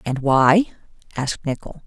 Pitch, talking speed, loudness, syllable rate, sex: 145 Hz, 130 wpm, -19 LUFS, 5.0 syllables/s, female